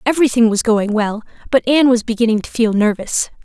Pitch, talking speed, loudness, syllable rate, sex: 230 Hz, 190 wpm, -15 LUFS, 6.2 syllables/s, female